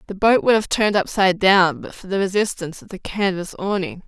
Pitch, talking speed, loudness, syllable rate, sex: 195 Hz, 220 wpm, -19 LUFS, 6.0 syllables/s, female